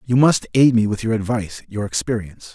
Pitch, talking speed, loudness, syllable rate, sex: 110 Hz, 210 wpm, -19 LUFS, 6.0 syllables/s, male